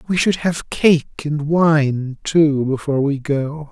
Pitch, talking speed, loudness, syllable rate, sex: 150 Hz, 160 wpm, -18 LUFS, 3.5 syllables/s, male